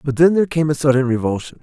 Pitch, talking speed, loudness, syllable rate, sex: 145 Hz, 260 wpm, -17 LUFS, 7.3 syllables/s, male